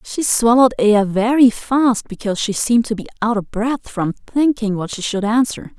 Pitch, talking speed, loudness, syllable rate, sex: 225 Hz, 195 wpm, -17 LUFS, 5.1 syllables/s, female